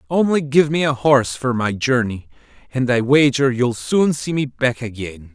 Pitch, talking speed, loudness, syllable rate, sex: 130 Hz, 190 wpm, -18 LUFS, 4.6 syllables/s, male